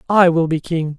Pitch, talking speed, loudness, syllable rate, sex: 165 Hz, 245 wpm, -16 LUFS, 4.9 syllables/s, male